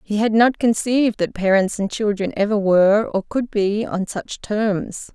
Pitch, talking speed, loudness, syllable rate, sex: 210 Hz, 185 wpm, -19 LUFS, 4.5 syllables/s, female